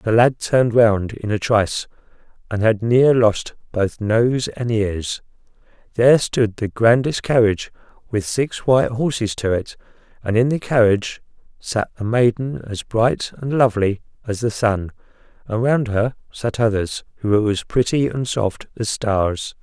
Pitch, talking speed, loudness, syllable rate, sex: 115 Hz, 160 wpm, -19 LUFS, 4.5 syllables/s, male